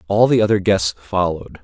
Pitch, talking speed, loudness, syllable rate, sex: 95 Hz, 185 wpm, -17 LUFS, 5.7 syllables/s, male